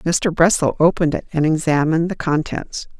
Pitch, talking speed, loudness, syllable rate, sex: 165 Hz, 160 wpm, -18 LUFS, 5.4 syllables/s, female